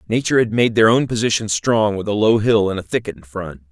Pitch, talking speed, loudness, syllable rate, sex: 105 Hz, 260 wpm, -17 LUFS, 6.0 syllables/s, male